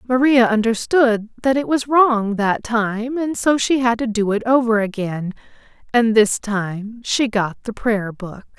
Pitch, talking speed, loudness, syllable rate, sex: 230 Hz, 175 wpm, -18 LUFS, 3.9 syllables/s, female